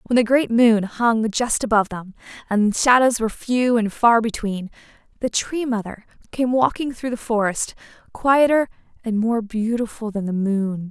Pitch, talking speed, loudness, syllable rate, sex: 225 Hz, 165 wpm, -20 LUFS, 4.6 syllables/s, female